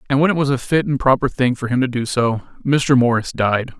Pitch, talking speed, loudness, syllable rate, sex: 130 Hz, 270 wpm, -18 LUFS, 5.7 syllables/s, male